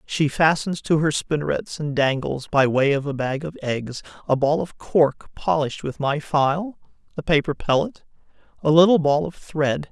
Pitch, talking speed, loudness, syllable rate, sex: 150 Hz, 180 wpm, -21 LUFS, 4.7 syllables/s, male